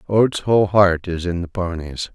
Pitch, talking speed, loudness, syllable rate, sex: 90 Hz, 195 wpm, -19 LUFS, 5.1 syllables/s, male